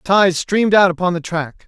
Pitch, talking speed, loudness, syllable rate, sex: 180 Hz, 215 wpm, -16 LUFS, 5.1 syllables/s, male